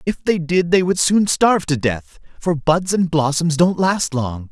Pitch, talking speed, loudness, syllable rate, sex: 165 Hz, 215 wpm, -17 LUFS, 4.3 syllables/s, male